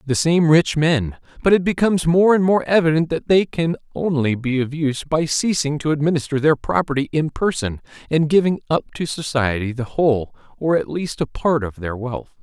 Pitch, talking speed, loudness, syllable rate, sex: 150 Hz, 200 wpm, -19 LUFS, 5.3 syllables/s, male